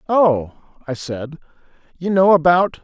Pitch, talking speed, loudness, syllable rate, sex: 165 Hz, 125 wpm, -17 LUFS, 3.9 syllables/s, male